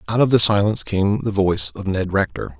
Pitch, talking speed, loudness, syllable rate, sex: 100 Hz, 230 wpm, -18 LUFS, 6.0 syllables/s, male